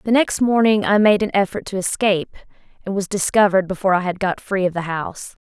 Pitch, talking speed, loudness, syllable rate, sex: 195 Hz, 220 wpm, -18 LUFS, 6.4 syllables/s, female